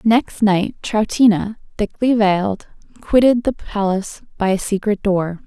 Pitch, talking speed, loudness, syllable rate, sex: 210 Hz, 130 wpm, -18 LUFS, 4.3 syllables/s, female